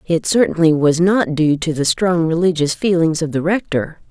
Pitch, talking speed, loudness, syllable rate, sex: 165 Hz, 190 wpm, -16 LUFS, 4.9 syllables/s, female